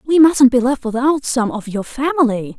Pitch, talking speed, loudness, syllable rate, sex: 255 Hz, 210 wpm, -16 LUFS, 4.9 syllables/s, female